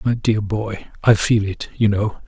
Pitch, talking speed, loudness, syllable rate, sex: 105 Hz, 210 wpm, -19 LUFS, 4.1 syllables/s, male